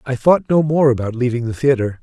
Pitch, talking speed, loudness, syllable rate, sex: 130 Hz, 235 wpm, -16 LUFS, 5.9 syllables/s, male